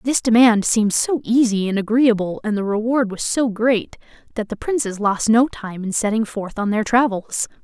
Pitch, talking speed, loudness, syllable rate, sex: 220 Hz, 195 wpm, -19 LUFS, 4.9 syllables/s, female